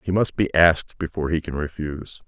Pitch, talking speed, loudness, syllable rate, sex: 80 Hz, 210 wpm, -22 LUFS, 6.2 syllables/s, male